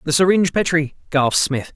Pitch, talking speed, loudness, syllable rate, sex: 155 Hz, 170 wpm, -18 LUFS, 6.0 syllables/s, male